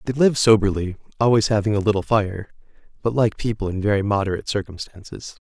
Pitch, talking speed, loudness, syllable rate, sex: 105 Hz, 165 wpm, -20 LUFS, 6.5 syllables/s, male